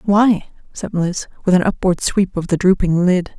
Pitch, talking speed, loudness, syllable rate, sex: 185 Hz, 195 wpm, -17 LUFS, 4.5 syllables/s, female